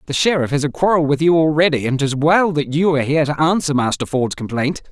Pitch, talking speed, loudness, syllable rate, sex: 150 Hz, 245 wpm, -17 LUFS, 6.2 syllables/s, male